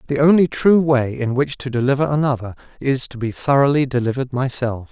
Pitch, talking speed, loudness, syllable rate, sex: 130 Hz, 185 wpm, -18 LUFS, 5.8 syllables/s, male